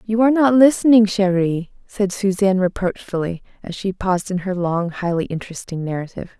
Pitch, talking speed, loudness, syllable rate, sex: 190 Hz, 160 wpm, -19 LUFS, 5.7 syllables/s, female